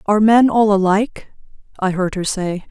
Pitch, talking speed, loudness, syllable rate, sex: 205 Hz, 180 wpm, -16 LUFS, 5.3 syllables/s, female